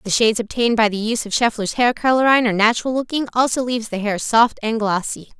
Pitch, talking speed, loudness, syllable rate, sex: 230 Hz, 220 wpm, -18 LUFS, 6.9 syllables/s, female